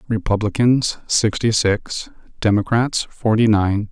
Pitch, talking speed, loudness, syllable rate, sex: 110 Hz, 90 wpm, -18 LUFS, 3.9 syllables/s, male